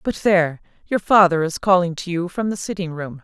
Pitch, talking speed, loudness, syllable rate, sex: 180 Hz, 225 wpm, -19 LUFS, 5.5 syllables/s, female